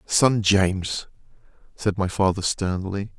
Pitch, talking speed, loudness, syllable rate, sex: 100 Hz, 115 wpm, -23 LUFS, 3.8 syllables/s, male